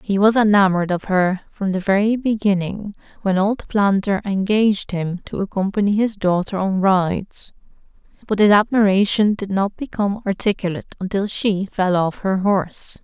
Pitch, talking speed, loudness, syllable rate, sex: 200 Hz, 150 wpm, -19 LUFS, 5.0 syllables/s, female